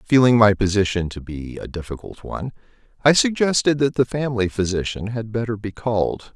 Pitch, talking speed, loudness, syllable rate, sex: 115 Hz, 170 wpm, -20 LUFS, 5.6 syllables/s, male